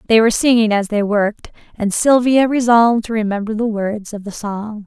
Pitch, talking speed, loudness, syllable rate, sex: 220 Hz, 195 wpm, -16 LUFS, 5.4 syllables/s, female